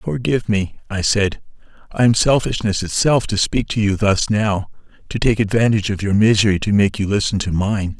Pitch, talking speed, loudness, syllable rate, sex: 105 Hz, 195 wpm, -17 LUFS, 5.3 syllables/s, male